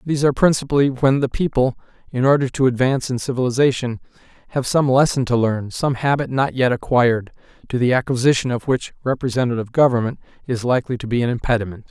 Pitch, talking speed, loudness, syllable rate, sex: 125 Hz, 175 wpm, -19 LUFS, 6.6 syllables/s, male